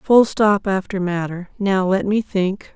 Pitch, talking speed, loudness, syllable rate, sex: 195 Hz, 175 wpm, -19 LUFS, 3.8 syllables/s, female